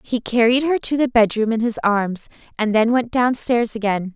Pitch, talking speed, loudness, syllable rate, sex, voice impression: 230 Hz, 200 wpm, -19 LUFS, 4.8 syllables/s, female, very feminine, very middle-aged, very thin, tensed, very powerful, very bright, slightly soft, very clear, fluent, slightly cute, intellectual, slightly refreshing, sincere, calm, slightly friendly, slightly reassuring, very unique, elegant, slightly wild, slightly sweet, lively, strict, intense, very sharp, very light